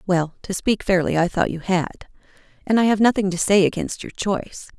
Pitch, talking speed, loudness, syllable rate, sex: 185 Hz, 200 wpm, -20 LUFS, 5.7 syllables/s, female